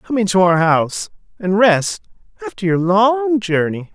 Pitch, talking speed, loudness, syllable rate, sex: 175 Hz, 150 wpm, -16 LUFS, 4.5 syllables/s, male